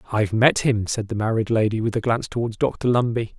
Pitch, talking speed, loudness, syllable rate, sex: 115 Hz, 230 wpm, -21 LUFS, 6.0 syllables/s, male